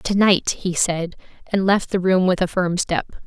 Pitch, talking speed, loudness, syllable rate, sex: 185 Hz, 220 wpm, -20 LUFS, 4.4 syllables/s, female